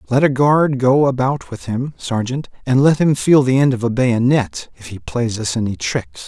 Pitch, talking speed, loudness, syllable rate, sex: 130 Hz, 220 wpm, -17 LUFS, 4.6 syllables/s, male